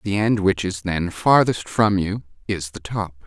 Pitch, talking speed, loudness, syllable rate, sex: 100 Hz, 200 wpm, -21 LUFS, 4.3 syllables/s, male